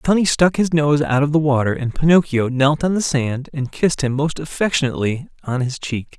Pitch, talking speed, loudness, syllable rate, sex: 140 Hz, 225 wpm, -18 LUFS, 5.5 syllables/s, male